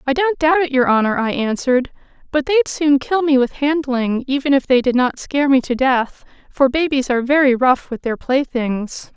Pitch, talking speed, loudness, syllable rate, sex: 270 Hz, 225 wpm, -17 LUFS, 5.3 syllables/s, female